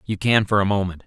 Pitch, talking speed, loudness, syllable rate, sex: 100 Hz, 280 wpm, -20 LUFS, 6.3 syllables/s, male